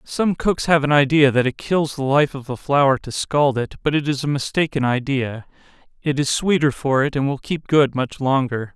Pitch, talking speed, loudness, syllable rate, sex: 140 Hz, 220 wpm, -19 LUFS, 4.9 syllables/s, male